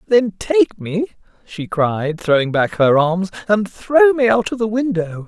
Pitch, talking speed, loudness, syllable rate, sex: 200 Hz, 180 wpm, -17 LUFS, 3.9 syllables/s, male